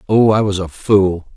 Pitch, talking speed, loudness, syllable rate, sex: 100 Hz, 220 wpm, -15 LUFS, 4.2 syllables/s, male